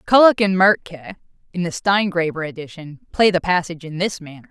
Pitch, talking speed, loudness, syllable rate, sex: 175 Hz, 175 wpm, -18 LUFS, 5.5 syllables/s, female